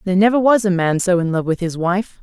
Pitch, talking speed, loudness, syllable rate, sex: 190 Hz, 295 wpm, -17 LUFS, 6.2 syllables/s, female